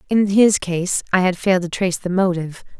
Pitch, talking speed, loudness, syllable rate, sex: 185 Hz, 215 wpm, -18 LUFS, 5.8 syllables/s, female